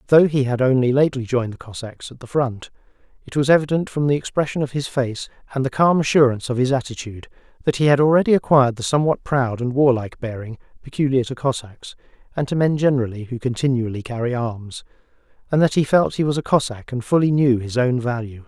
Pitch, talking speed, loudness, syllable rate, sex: 130 Hz, 205 wpm, -20 LUFS, 6.3 syllables/s, male